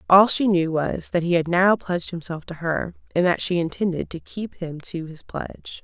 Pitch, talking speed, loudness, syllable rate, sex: 175 Hz, 225 wpm, -23 LUFS, 5.0 syllables/s, female